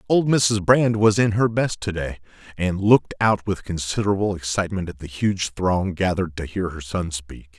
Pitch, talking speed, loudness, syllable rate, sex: 95 Hz, 200 wpm, -21 LUFS, 5.0 syllables/s, male